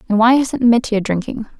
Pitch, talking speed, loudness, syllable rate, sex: 230 Hz, 190 wpm, -15 LUFS, 5.2 syllables/s, female